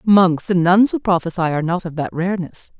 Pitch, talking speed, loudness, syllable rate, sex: 180 Hz, 215 wpm, -17 LUFS, 5.6 syllables/s, female